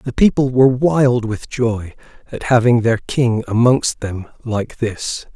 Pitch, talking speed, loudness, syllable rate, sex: 120 Hz, 155 wpm, -17 LUFS, 3.9 syllables/s, male